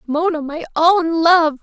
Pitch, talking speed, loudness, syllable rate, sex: 325 Hz, 150 wpm, -16 LUFS, 3.7 syllables/s, female